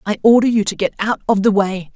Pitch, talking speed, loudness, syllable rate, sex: 210 Hz, 275 wpm, -16 LUFS, 6.0 syllables/s, female